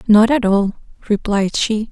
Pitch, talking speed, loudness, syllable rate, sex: 215 Hz, 155 wpm, -16 LUFS, 4.1 syllables/s, female